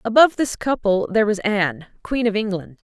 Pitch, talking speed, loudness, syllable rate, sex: 215 Hz, 185 wpm, -20 LUFS, 5.8 syllables/s, female